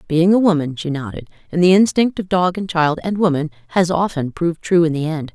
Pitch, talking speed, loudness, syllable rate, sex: 170 Hz, 235 wpm, -17 LUFS, 5.8 syllables/s, female